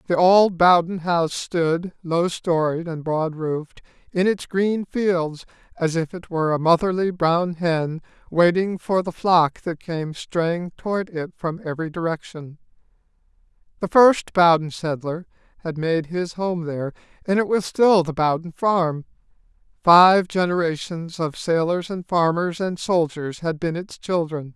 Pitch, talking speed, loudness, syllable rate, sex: 170 Hz, 150 wpm, -21 LUFS, 4.2 syllables/s, male